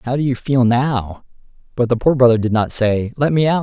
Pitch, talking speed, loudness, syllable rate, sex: 125 Hz, 250 wpm, -16 LUFS, 5.3 syllables/s, male